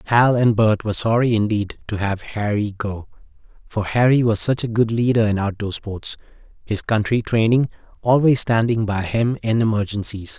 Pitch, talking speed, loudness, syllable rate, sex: 110 Hz, 170 wpm, -19 LUFS, 5.0 syllables/s, male